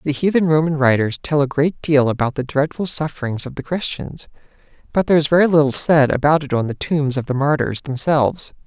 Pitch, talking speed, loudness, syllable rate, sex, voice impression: 145 Hz, 210 wpm, -18 LUFS, 5.8 syllables/s, male, masculine, adult-like, slightly soft, slightly fluent, slightly calm, unique, slightly sweet, kind